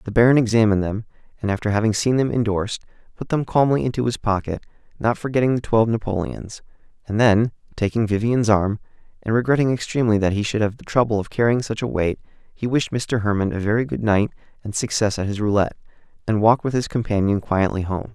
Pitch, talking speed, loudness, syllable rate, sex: 110 Hz, 200 wpm, -21 LUFS, 6.4 syllables/s, male